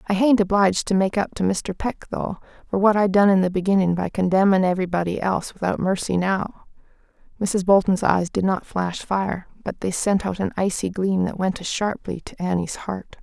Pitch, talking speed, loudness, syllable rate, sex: 190 Hz, 205 wpm, -22 LUFS, 5.3 syllables/s, female